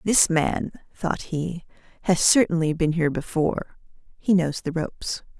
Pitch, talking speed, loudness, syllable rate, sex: 165 Hz, 145 wpm, -23 LUFS, 4.5 syllables/s, female